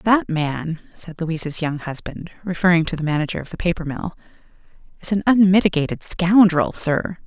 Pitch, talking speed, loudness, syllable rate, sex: 170 Hz, 155 wpm, -20 LUFS, 5.2 syllables/s, female